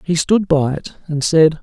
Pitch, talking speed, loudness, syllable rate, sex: 160 Hz, 220 wpm, -16 LUFS, 4.2 syllables/s, male